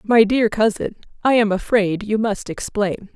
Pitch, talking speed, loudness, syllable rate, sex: 215 Hz, 170 wpm, -19 LUFS, 4.4 syllables/s, female